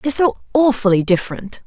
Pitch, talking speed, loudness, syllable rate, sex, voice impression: 230 Hz, 145 wpm, -16 LUFS, 6.0 syllables/s, female, feminine, adult-like, powerful, fluent, intellectual, slightly strict